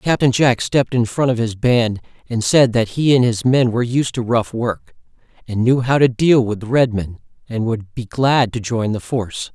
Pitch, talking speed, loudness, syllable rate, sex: 120 Hz, 240 wpm, -17 LUFS, 4.9 syllables/s, male